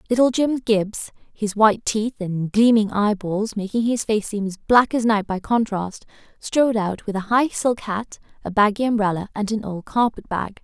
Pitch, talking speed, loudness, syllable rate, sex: 215 Hz, 190 wpm, -21 LUFS, 4.7 syllables/s, female